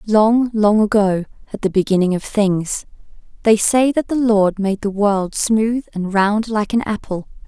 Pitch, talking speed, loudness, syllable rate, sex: 210 Hz, 175 wpm, -17 LUFS, 4.2 syllables/s, female